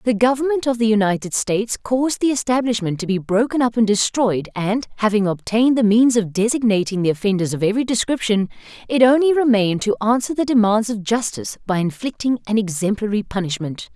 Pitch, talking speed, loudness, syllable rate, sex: 220 Hz, 175 wpm, -19 LUFS, 6.1 syllables/s, female